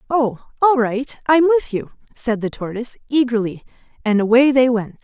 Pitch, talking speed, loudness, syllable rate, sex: 245 Hz, 165 wpm, -18 LUFS, 5.0 syllables/s, female